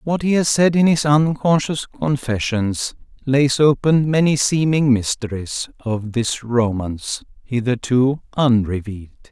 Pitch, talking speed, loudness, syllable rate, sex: 130 Hz, 115 wpm, -18 LUFS, 4.1 syllables/s, male